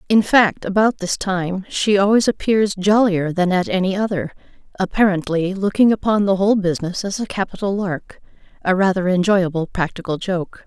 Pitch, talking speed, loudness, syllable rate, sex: 195 Hz, 150 wpm, -18 LUFS, 5.1 syllables/s, female